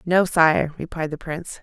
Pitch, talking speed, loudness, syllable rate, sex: 165 Hz, 185 wpm, -21 LUFS, 4.7 syllables/s, female